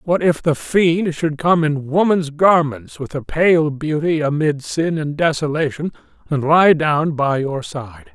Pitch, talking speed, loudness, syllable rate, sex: 155 Hz, 170 wpm, -17 LUFS, 3.9 syllables/s, male